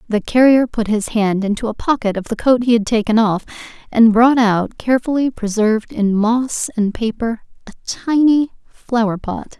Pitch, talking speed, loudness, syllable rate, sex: 230 Hz, 175 wpm, -16 LUFS, 4.7 syllables/s, female